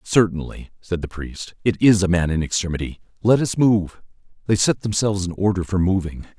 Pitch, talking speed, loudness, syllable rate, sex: 95 Hz, 180 wpm, -20 LUFS, 5.5 syllables/s, male